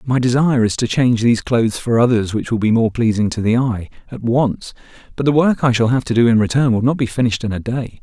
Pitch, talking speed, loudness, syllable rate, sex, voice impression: 120 Hz, 270 wpm, -16 LUFS, 6.3 syllables/s, male, very masculine, very adult-like, very middle-aged, thick, slightly relaxed, slightly weak, slightly dark, soft, slightly muffled, fluent, slightly raspy, cool, very intellectual, slightly refreshing, sincere, calm, friendly, reassuring, unique, elegant, wild, slightly sweet, lively, very kind, modest, slightly light